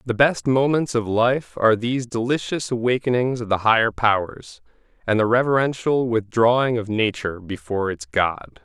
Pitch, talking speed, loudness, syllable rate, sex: 115 Hz, 155 wpm, -20 LUFS, 5.2 syllables/s, male